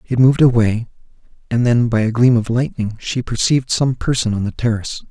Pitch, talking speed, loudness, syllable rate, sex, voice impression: 120 Hz, 200 wpm, -17 LUFS, 5.8 syllables/s, male, masculine, adult-like, slightly relaxed, slightly weak, soft, slightly raspy, slightly refreshing, sincere, calm, kind, modest